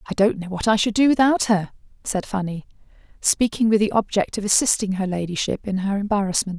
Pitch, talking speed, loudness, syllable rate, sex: 205 Hz, 200 wpm, -21 LUFS, 5.9 syllables/s, female